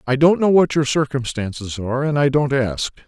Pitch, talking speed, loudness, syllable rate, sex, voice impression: 135 Hz, 215 wpm, -18 LUFS, 5.3 syllables/s, male, very masculine, very adult-like, slightly thick, slightly muffled, cool, sincere, slightly kind